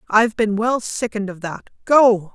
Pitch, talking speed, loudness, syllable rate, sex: 215 Hz, 180 wpm, -18 LUFS, 5.0 syllables/s, female